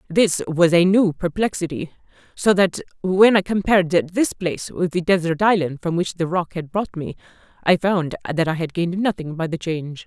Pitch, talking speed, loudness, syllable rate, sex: 175 Hz, 195 wpm, -20 LUFS, 5.1 syllables/s, female